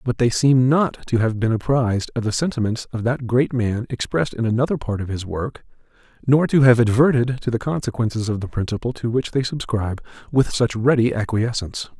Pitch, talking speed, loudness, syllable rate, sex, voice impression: 120 Hz, 200 wpm, -20 LUFS, 5.7 syllables/s, male, masculine, very adult-like, slightly thick, fluent, cool, slightly intellectual, slightly friendly, slightly kind